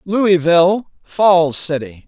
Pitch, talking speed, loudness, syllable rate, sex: 175 Hz, 85 wpm, -14 LUFS, 3.2 syllables/s, male